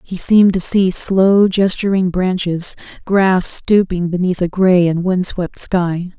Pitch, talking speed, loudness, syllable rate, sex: 185 Hz, 155 wpm, -15 LUFS, 3.9 syllables/s, female